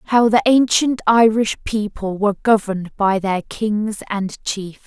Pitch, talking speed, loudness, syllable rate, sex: 210 Hz, 150 wpm, -18 LUFS, 4.0 syllables/s, female